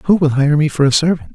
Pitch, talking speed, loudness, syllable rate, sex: 150 Hz, 315 wpm, -14 LUFS, 6.1 syllables/s, male